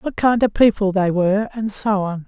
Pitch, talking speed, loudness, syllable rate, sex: 205 Hz, 240 wpm, -18 LUFS, 5.1 syllables/s, female